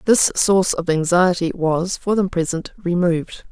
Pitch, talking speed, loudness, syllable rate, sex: 175 Hz, 155 wpm, -18 LUFS, 4.7 syllables/s, female